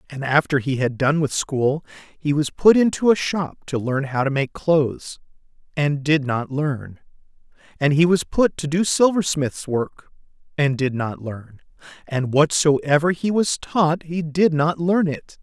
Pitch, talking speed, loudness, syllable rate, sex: 150 Hz, 175 wpm, -20 LUFS, 4.1 syllables/s, male